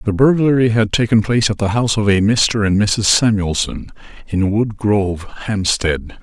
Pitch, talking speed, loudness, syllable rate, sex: 105 Hz, 175 wpm, -16 LUFS, 4.7 syllables/s, male